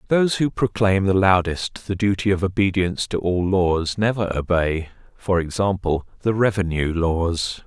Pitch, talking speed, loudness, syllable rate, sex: 95 Hz, 150 wpm, -21 LUFS, 4.6 syllables/s, male